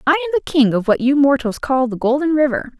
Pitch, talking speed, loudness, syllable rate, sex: 270 Hz, 260 wpm, -16 LUFS, 6.5 syllables/s, female